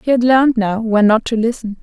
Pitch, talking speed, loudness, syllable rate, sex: 230 Hz, 265 wpm, -14 LUFS, 5.9 syllables/s, female